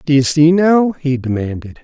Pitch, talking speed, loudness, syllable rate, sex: 145 Hz, 165 wpm, -14 LUFS, 4.1 syllables/s, male